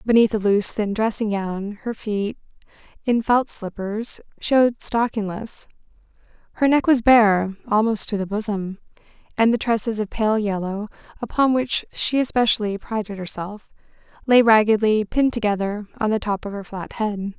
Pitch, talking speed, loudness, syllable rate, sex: 215 Hz, 150 wpm, -21 LUFS, 4.8 syllables/s, female